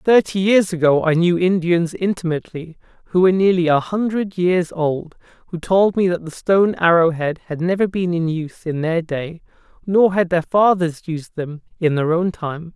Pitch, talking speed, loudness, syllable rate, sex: 175 Hz, 190 wpm, -18 LUFS, 4.9 syllables/s, male